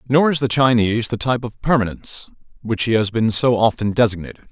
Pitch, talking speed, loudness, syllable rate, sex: 115 Hz, 200 wpm, -18 LUFS, 6.4 syllables/s, male